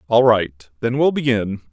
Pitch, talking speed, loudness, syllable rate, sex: 110 Hz, 175 wpm, -18 LUFS, 4.6 syllables/s, male